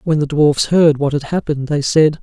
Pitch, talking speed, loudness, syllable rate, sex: 150 Hz, 240 wpm, -15 LUFS, 5.2 syllables/s, male